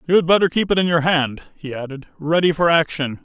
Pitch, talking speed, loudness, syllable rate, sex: 160 Hz, 220 wpm, -18 LUFS, 5.7 syllables/s, male